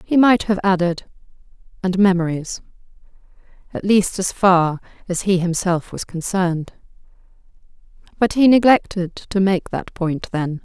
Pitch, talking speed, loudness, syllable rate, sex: 185 Hz, 130 wpm, -18 LUFS, 4.5 syllables/s, female